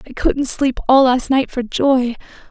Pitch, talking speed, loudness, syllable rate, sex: 260 Hz, 190 wpm, -16 LUFS, 4.1 syllables/s, female